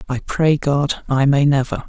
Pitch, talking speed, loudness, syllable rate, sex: 140 Hz, 190 wpm, -17 LUFS, 4.2 syllables/s, male